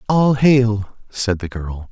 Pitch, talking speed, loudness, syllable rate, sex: 110 Hz, 155 wpm, -17 LUFS, 3.1 syllables/s, male